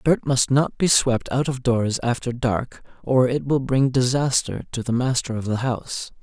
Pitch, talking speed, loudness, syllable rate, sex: 125 Hz, 200 wpm, -21 LUFS, 4.5 syllables/s, male